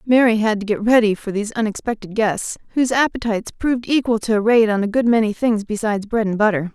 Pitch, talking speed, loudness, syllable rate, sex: 220 Hz, 220 wpm, -18 LUFS, 6.4 syllables/s, female